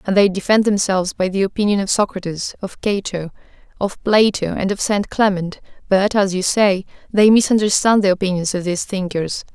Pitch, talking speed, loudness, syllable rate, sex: 195 Hz, 175 wpm, -17 LUFS, 5.4 syllables/s, female